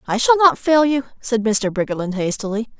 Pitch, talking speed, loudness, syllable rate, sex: 240 Hz, 195 wpm, -18 LUFS, 5.5 syllables/s, female